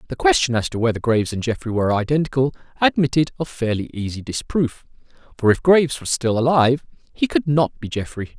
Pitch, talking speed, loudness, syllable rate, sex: 130 Hz, 185 wpm, -20 LUFS, 6.1 syllables/s, male